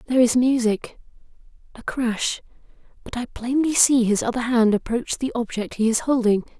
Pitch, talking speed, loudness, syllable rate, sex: 240 Hz, 145 wpm, -21 LUFS, 5.2 syllables/s, female